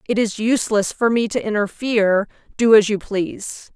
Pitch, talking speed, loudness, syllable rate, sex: 215 Hz, 175 wpm, -18 LUFS, 5.2 syllables/s, female